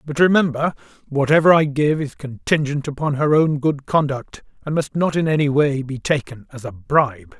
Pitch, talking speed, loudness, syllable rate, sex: 145 Hz, 185 wpm, -19 LUFS, 5.1 syllables/s, male